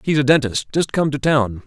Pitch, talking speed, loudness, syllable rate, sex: 135 Hz, 255 wpm, -18 LUFS, 5.3 syllables/s, male